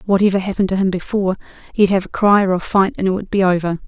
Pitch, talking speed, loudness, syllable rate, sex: 190 Hz, 265 wpm, -17 LUFS, 7.3 syllables/s, female